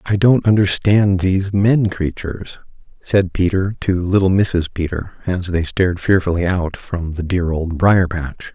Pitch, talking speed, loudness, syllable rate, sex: 90 Hz, 160 wpm, -17 LUFS, 4.4 syllables/s, male